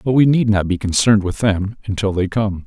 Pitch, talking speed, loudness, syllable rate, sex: 105 Hz, 245 wpm, -17 LUFS, 5.6 syllables/s, male